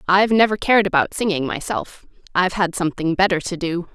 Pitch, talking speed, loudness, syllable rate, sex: 185 Hz, 185 wpm, -19 LUFS, 6.3 syllables/s, female